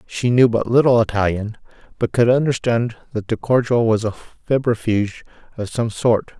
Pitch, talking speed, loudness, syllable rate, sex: 115 Hz, 160 wpm, -18 LUFS, 5.2 syllables/s, male